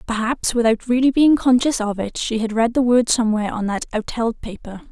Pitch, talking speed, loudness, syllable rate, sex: 230 Hz, 205 wpm, -19 LUFS, 5.6 syllables/s, female